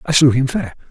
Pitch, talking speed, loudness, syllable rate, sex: 135 Hz, 265 wpm, -16 LUFS, 6.0 syllables/s, male